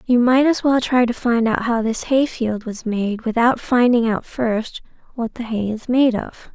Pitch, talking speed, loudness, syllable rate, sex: 235 Hz, 220 wpm, -19 LUFS, 4.3 syllables/s, female